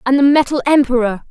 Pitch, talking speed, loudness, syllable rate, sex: 265 Hz, 185 wpm, -14 LUFS, 6.2 syllables/s, female